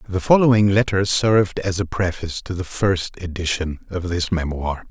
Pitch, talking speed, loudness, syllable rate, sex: 95 Hz, 170 wpm, -20 LUFS, 4.9 syllables/s, male